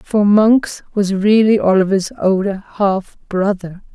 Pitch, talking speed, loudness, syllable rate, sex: 200 Hz, 120 wpm, -15 LUFS, 3.7 syllables/s, female